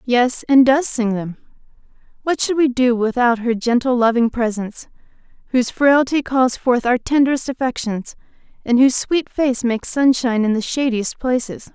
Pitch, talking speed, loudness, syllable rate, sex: 250 Hz, 160 wpm, -17 LUFS, 5.0 syllables/s, female